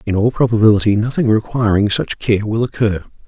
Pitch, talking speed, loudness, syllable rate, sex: 110 Hz, 165 wpm, -15 LUFS, 5.7 syllables/s, male